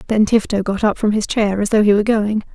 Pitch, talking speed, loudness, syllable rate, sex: 210 Hz, 285 wpm, -16 LUFS, 6.1 syllables/s, female